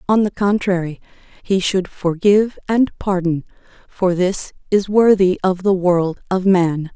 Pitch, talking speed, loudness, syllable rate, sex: 190 Hz, 145 wpm, -17 LUFS, 4.1 syllables/s, female